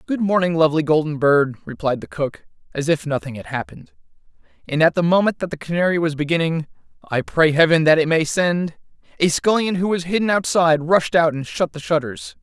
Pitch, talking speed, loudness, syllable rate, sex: 160 Hz, 200 wpm, -19 LUFS, 5.8 syllables/s, male